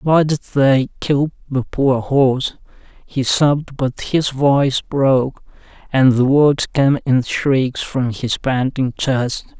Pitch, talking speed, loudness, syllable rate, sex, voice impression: 135 Hz, 145 wpm, -17 LUFS, 3.5 syllables/s, male, masculine, adult-like, powerful, bright, muffled, raspy, nasal, intellectual, slightly calm, mature, friendly, unique, wild, slightly lively, slightly intense